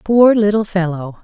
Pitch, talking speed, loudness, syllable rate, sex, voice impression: 195 Hz, 145 wpm, -14 LUFS, 4.6 syllables/s, female, very feminine, adult-like, slightly elegant